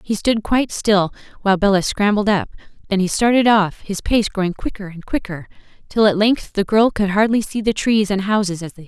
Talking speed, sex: 230 wpm, female